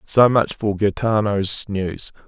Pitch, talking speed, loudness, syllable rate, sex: 105 Hz, 130 wpm, -19 LUFS, 3.5 syllables/s, male